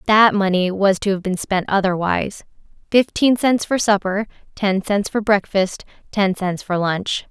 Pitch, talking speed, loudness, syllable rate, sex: 200 Hz, 155 wpm, -19 LUFS, 4.4 syllables/s, female